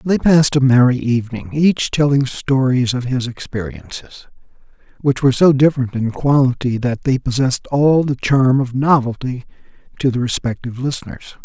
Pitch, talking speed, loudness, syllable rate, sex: 130 Hz, 150 wpm, -16 LUFS, 5.4 syllables/s, male